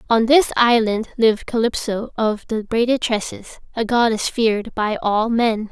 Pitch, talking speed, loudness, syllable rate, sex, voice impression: 225 Hz, 155 wpm, -19 LUFS, 4.5 syllables/s, female, feminine, young, tensed, powerful, bright, soft, slightly muffled, cute, friendly, slightly sweet, kind, slightly modest